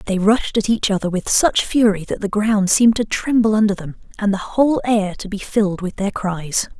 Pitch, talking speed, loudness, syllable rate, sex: 205 Hz, 230 wpm, -18 LUFS, 5.2 syllables/s, female